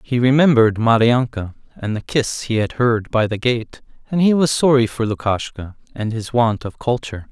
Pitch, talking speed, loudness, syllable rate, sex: 120 Hz, 190 wpm, -18 LUFS, 5.0 syllables/s, male